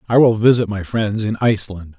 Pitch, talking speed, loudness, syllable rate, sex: 105 Hz, 210 wpm, -17 LUFS, 5.7 syllables/s, male